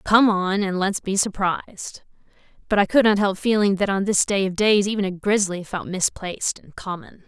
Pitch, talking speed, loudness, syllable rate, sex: 195 Hz, 205 wpm, -21 LUFS, 5.1 syllables/s, female